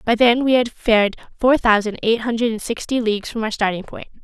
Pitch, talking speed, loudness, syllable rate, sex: 225 Hz, 215 wpm, -18 LUFS, 5.6 syllables/s, female